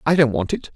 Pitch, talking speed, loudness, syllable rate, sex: 130 Hz, 320 wpm, -20 LUFS, 6.4 syllables/s, male